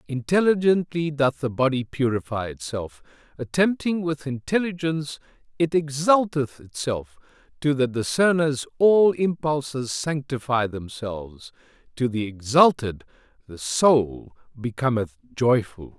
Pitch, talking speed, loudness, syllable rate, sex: 135 Hz, 100 wpm, -23 LUFS, 4.2 syllables/s, male